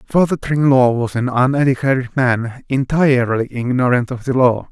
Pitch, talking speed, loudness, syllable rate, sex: 130 Hz, 140 wpm, -16 LUFS, 4.9 syllables/s, male